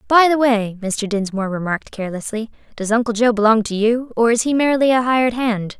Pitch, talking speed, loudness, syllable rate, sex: 230 Hz, 205 wpm, -18 LUFS, 6.0 syllables/s, female